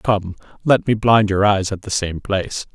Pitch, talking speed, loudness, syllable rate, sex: 100 Hz, 220 wpm, -18 LUFS, 4.6 syllables/s, male